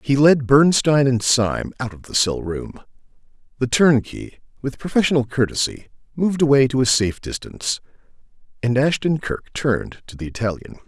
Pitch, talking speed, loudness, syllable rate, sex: 130 Hz, 155 wpm, -19 LUFS, 5.3 syllables/s, male